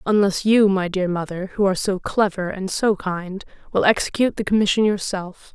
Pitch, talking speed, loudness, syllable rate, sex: 195 Hz, 185 wpm, -20 LUFS, 5.3 syllables/s, female